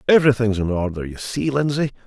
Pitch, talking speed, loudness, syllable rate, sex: 120 Hz, 205 wpm, -20 LUFS, 6.9 syllables/s, male